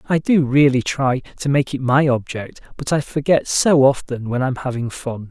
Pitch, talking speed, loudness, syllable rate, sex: 135 Hz, 205 wpm, -18 LUFS, 4.6 syllables/s, male